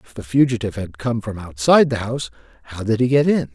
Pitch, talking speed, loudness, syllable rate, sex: 115 Hz, 235 wpm, -19 LUFS, 6.7 syllables/s, male